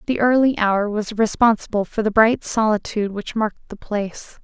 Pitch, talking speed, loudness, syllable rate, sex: 215 Hz, 175 wpm, -19 LUFS, 5.4 syllables/s, female